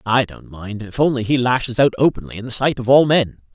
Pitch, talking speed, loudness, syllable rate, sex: 120 Hz, 255 wpm, -17 LUFS, 5.9 syllables/s, male